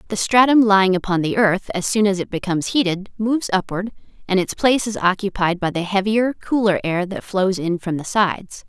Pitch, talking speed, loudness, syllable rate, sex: 195 Hz, 205 wpm, -19 LUFS, 5.6 syllables/s, female